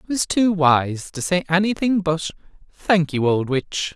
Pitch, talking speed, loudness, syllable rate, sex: 170 Hz, 180 wpm, -20 LUFS, 4.2 syllables/s, male